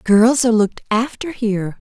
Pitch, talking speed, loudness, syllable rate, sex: 230 Hz, 160 wpm, -17 LUFS, 5.3 syllables/s, female